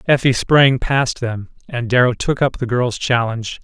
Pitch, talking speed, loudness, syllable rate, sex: 125 Hz, 180 wpm, -17 LUFS, 4.5 syllables/s, male